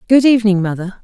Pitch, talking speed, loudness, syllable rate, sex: 210 Hz, 175 wpm, -13 LUFS, 7.1 syllables/s, female